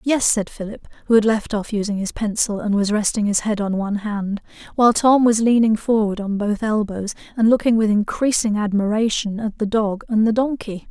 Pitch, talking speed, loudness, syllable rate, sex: 215 Hz, 205 wpm, -19 LUFS, 5.3 syllables/s, female